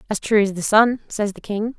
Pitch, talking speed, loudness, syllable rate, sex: 210 Hz, 270 wpm, -19 LUFS, 5.2 syllables/s, female